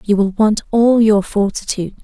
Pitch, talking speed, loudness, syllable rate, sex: 210 Hz, 175 wpm, -15 LUFS, 5.0 syllables/s, female